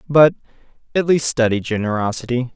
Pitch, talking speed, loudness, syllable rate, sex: 130 Hz, 120 wpm, -18 LUFS, 5.7 syllables/s, male